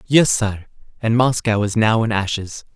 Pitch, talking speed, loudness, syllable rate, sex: 110 Hz, 175 wpm, -18 LUFS, 4.5 syllables/s, male